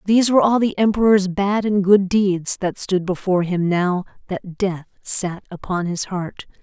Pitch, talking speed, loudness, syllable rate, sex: 190 Hz, 180 wpm, -19 LUFS, 4.6 syllables/s, female